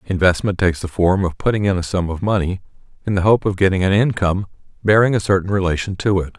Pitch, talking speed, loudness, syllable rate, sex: 95 Hz, 225 wpm, -18 LUFS, 6.6 syllables/s, male